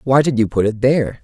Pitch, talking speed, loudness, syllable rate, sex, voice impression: 120 Hz, 290 wpm, -16 LUFS, 6.2 syllables/s, male, masculine, adult-like, slightly cool, slightly refreshing, sincere, friendly, slightly kind